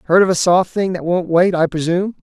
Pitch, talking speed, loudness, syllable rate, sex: 175 Hz, 265 wpm, -16 LUFS, 6.0 syllables/s, male